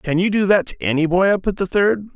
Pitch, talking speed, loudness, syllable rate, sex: 185 Hz, 305 wpm, -18 LUFS, 5.9 syllables/s, male